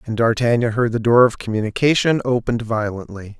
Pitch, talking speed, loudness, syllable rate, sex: 115 Hz, 160 wpm, -18 LUFS, 5.9 syllables/s, male